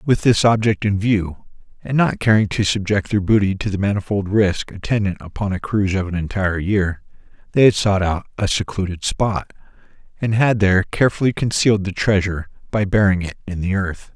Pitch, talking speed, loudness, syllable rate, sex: 100 Hz, 185 wpm, -19 LUFS, 5.5 syllables/s, male